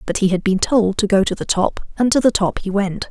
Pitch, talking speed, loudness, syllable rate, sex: 200 Hz, 310 wpm, -18 LUFS, 5.7 syllables/s, female